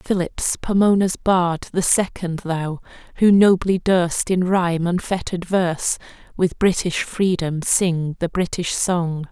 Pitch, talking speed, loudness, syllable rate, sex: 175 Hz, 130 wpm, -20 LUFS, 3.9 syllables/s, female